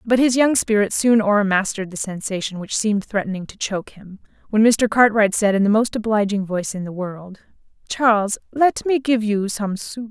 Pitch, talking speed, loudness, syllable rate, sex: 210 Hz, 200 wpm, -19 LUFS, 5.4 syllables/s, female